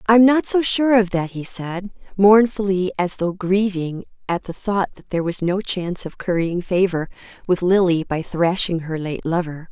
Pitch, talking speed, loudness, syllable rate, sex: 185 Hz, 185 wpm, -20 LUFS, 4.6 syllables/s, female